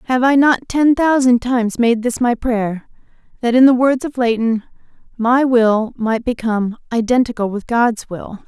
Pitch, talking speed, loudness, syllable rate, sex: 240 Hz, 170 wpm, -16 LUFS, 4.6 syllables/s, female